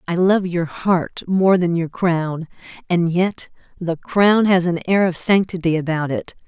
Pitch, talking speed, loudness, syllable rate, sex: 175 Hz, 175 wpm, -18 LUFS, 4.0 syllables/s, female